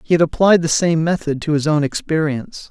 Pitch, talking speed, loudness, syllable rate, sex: 155 Hz, 220 wpm, -17 LUFS, 5.8 syllables/s, male